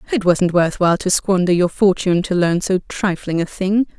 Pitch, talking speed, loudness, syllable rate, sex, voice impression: 185 Hz, 210 wpm, -17 LUFS, 5.2 syllables/s, female, very feminine, very adult-like, very middle-aged, very thin, tensed, slightly powerful, bright, soft, very clear, fluent, slightly raspy, cool, very intellectual, refreshing, very sincere, very calm, slightly mature, very friendly, very reassuring, slightly unique, very elegant, sweet, slightly lively, very kind, modest